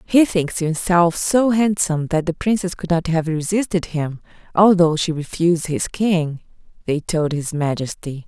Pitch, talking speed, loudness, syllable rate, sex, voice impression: 170 Hz, 160 wpm, -19 LUFS, 4.5 syllables/s, female, feminine, middle-aged, powerful, slightly hard, raspy, intellectual, calm, elegant, lively, strict, sharp